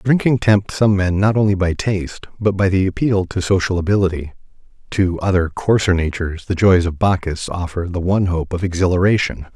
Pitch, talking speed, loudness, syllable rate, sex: 95 Hz, 175 wpm, -17 LUFS, 5.4 syllables/s, male